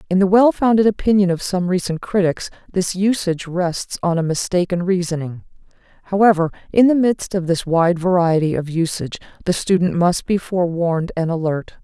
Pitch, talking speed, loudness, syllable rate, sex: 180 Hz, 165 wpm, -18 LUFS, 5.4 syllables/s, female